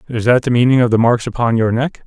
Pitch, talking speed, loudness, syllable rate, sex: 120 Hz, 290 wpm, -14 LUFS, 6.5 syllables/s, male